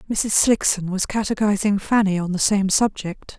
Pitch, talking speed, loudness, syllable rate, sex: 200 Hz, 160 wpm, -19 LUFS, 4.7 syllables/s, female